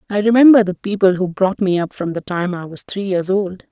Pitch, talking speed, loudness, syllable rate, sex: 190 Hz, 260 wpm, -16 LUFS, 5.4 syllables/s, female